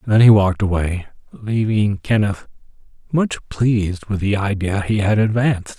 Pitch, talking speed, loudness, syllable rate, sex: 105 Hz, 145 wpm, -18 LUFS, 4.8 syllables/s, male